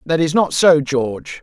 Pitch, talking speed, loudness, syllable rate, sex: 155 Hz, 210 wpm, -16 LUFS, 4.5 syllables/s, male